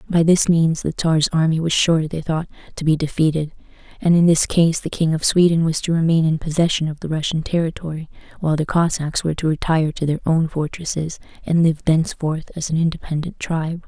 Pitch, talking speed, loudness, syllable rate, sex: 160 Hz, 205 wpm, -19 LUFS, 5.8 syllables/s, female